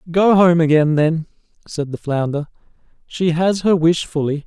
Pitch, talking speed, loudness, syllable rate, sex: 165 Hz, 160 wpm, -17 LUFS, 4.6 syllables/s, male